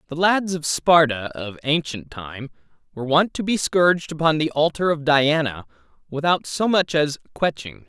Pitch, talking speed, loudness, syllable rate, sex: 150 Hz, 170 wpm, -20 LUFS, 4.7 syllables/s, male